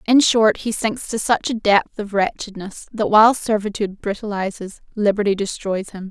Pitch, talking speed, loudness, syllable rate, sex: 210 Hz, 165 wpm, -19 LUFS, 5.0 syllables/s, female